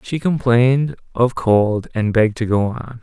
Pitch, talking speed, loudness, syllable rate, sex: 120 Hz, 180 wpm, -17 LUFS, 4.5 syllables/s, male